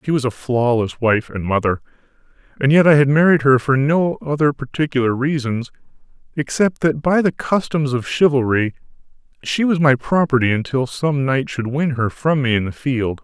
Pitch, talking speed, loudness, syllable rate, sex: 135 Hz, 180 wpm, -18 LUFS, 5.0 syllables/s, male